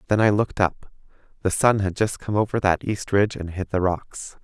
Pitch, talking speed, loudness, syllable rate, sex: 100 Hz, 230 wpm, -22 LUFS, 5.4 syllables/s, male